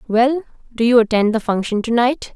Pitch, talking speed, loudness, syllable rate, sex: 235 Hz, 205 wpm, -17 LUFS, 5.3 syllables/s, female